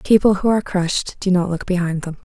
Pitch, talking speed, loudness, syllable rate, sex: 185 Hz, 235 wpm, -19 LUFS, 6.2 syllables/s, female